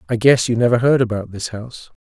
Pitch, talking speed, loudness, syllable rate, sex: 115 Hz, 235 wpm, -17 LUFS, 6.3 syllables/s, male